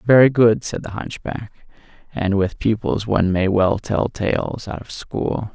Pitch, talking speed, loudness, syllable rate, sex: 105 Hz, 175 wpm, -20 LUFS, 4.0 syllables/s, male